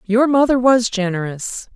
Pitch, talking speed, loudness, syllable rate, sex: 225 Hz, 135 wpm, -17 LUFS, 4.4 syllables/s, female